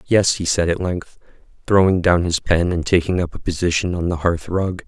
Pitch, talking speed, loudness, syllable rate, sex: 90 Hz, 220 wpm, -19 LUFS, 5.2 syllables/s, male